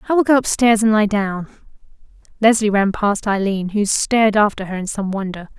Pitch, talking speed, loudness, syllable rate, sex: 210 Hz, 195 wpm, -17 LUFS, 5.4 syllables/s, female